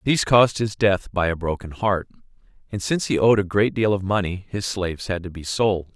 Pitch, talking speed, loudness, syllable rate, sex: 100 Hz, 230 wpm, -22 LUFS, 5.7 syllables/s, male